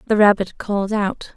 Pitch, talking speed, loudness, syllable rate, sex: 205 Hz, 175 wpm, -19 LUFS, 5.2 syllables/s, female